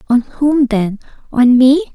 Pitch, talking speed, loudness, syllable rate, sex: 255 Hz, 125 wpm, -13 LUFS, 3.7 syllables/s, female